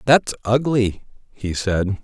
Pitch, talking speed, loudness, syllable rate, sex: 110 Hz, 120 wpm, -20 LUFS, 3.3 syllables/s, male